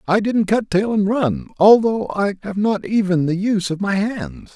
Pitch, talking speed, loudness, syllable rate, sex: 195 Hz, 210 wpm, -18 LUFS, 4.6 syllables/s, male